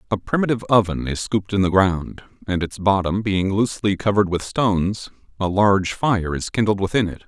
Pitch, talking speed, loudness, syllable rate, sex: 100 Hz, 190 wpm, -20 LUFS, 5.7 syllables/s, male